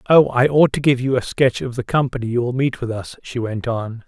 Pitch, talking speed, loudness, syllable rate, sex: 125 Hz, 280 wpm, -19 LUFS, 5.5 syllables/s, male